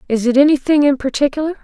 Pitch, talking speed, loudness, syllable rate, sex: 275 Hz, 185 wpm, -14 LUFS, 7.2 syllables/s, female